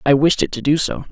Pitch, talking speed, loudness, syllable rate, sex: 145 Hz, 325 wpm, -17 LUFS, 6.1 syllables/s, male